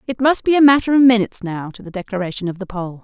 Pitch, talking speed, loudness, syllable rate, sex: 215 Hz, 275 wpm, -16 LUFS, 7.0 syllables/s, female